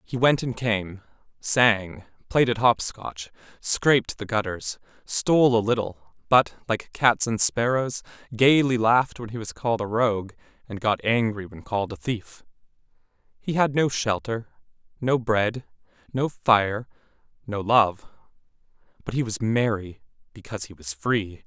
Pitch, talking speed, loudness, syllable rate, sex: 110 Hz, 145 wpm, -24 LUFS, 4.3 syllables/s, male